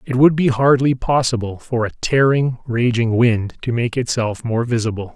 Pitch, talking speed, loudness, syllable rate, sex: 120 Hz, 175 wpm, -18 LUFS, 4.7 syllables/s, male